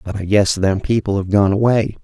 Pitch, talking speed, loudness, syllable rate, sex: 100 Hz, 235 wpm, -16 LUFS, 5.3 syllables/s, male